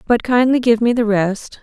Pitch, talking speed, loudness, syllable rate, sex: 230 Hz, 220 wpm, -15 LUFS, 4.8 syllables/s, female